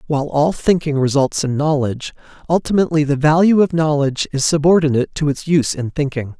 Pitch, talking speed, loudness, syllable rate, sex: 150 Hz, 170 wpm, -16 LUFS, 6.2 syllables/s, male